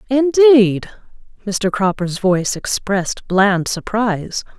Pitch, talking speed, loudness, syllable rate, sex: 210 Hz, 90 wpm, -16 LUFS, 3.8 syllables/s, female